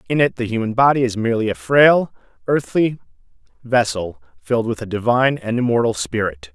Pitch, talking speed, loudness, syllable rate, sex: 115 Hz, 165 wpm, -18 LUFS, 5.7 syllables/s, male